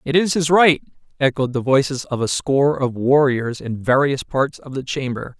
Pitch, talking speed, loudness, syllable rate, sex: 135 Hz, 200 wpm, -19 LUFS, 4.9 syllables/s, male